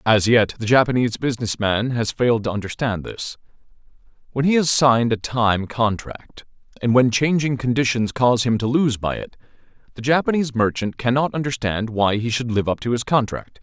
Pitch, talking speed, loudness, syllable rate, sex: 120 Hz, 180 wpm, -20 LUFS, 5.5 syllables/s, male